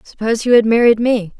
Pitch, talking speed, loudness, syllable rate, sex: 225 Hz, 215 wpm, -14 LUFS, 6.4 syllables/s, female